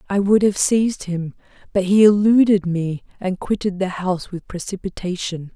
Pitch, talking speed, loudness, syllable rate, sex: 190 Hz, 160 wpm, -19 LUFS, 5.0 syllables/s, female